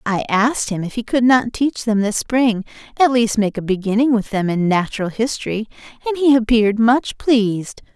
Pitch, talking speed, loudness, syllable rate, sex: 225 Hz, 195 wpm, -17 LUFS, 5.3 syllables/s, female